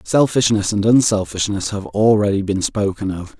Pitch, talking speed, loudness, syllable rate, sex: 100 Hz, 140 wpm, -17 LUFS, 4.9 syllables/s, male